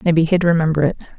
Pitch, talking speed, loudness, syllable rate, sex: 165 Hz, 205 wpm, -17 LUFS, 7.8 syllables/s, female